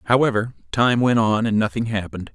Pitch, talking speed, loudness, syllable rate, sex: 110 Hz, 180 wpm, -20 LUFS, 5.6 syllables/s, male